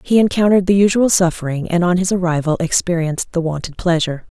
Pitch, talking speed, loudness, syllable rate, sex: 175 Hz, 180 wpm, -16 LUFS, 6.5 syllables/s, female